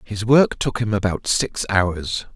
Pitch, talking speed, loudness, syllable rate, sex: 105 Hz, 180 wpm, -20 LUFS, 3.7 syllables/s, male